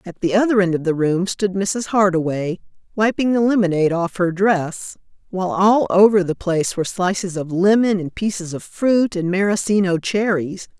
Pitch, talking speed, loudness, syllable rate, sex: 190 Hz, 180 wpm, -18 LUFS, 4.9 syllables/s, female